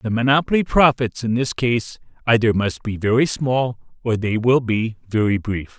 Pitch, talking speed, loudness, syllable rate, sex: 115 Hz, 175 wpm, -19 LUFS, 4.7 syllables/s, male